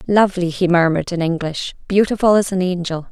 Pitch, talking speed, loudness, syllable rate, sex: 180 Hz, 175 wpm, -17 LUFS, 6.0 syllables/s, female